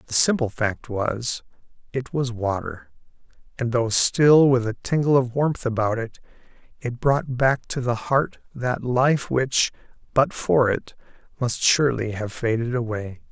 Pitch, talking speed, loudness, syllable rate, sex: 120 Hz, 150 wpm, -22 LUFS, 4.1 syllables/s, male